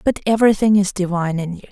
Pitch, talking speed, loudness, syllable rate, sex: 195 Hz, 210 wpm, -17 LUFS, 7.4 syllables/s, female